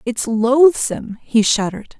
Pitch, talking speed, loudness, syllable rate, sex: 235 Hz, 120 wpm, -16 LUFS, 4.4 syllables/s, female